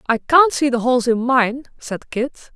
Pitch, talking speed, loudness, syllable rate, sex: 255 Hz, 210 wpm, -17 LUFS, 4.4 syllables/s, female